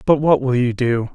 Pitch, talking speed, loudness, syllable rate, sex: 130 Hz, 265 wpm, -17 LUFS, 5.0 syllables/s, male